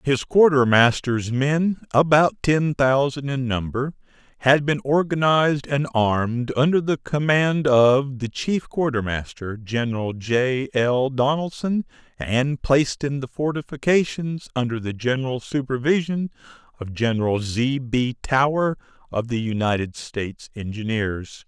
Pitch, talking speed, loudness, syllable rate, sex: 135 Hz, 120 wpm, -21 LUFS, 4.2 syllables/s, male